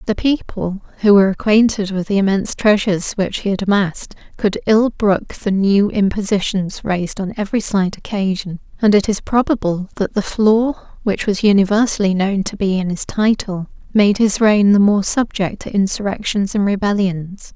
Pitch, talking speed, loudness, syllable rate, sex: 200 Hz, 170 wpm, -17 LUFS, 5.0 syllables/s, female